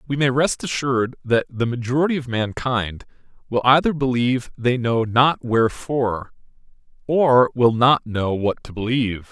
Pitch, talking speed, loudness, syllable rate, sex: 125 Hz, 150 wpm, -20 LUFS, 4.8 syllables/s, male